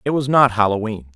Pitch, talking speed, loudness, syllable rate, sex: 115 Hz, 210 wpm, -17 LUFS, 5.9 syllables/s, male